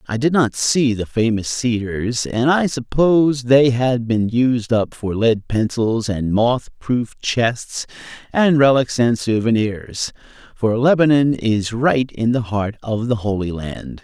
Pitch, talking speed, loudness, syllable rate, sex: 120 Hz, 160 wpm, -18 LUFS, 3.8 syllables/s, male